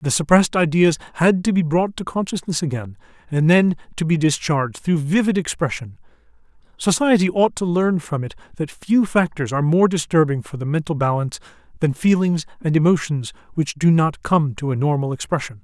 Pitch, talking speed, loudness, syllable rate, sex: 160 Hz, 175 wpm, -19 LUFS, 5.5 syllables/s, male